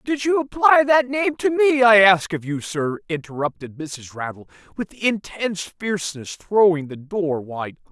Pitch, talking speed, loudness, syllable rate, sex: 195 Hz, 175 wpm, -20 LUFS, 4.6 syllables/s, male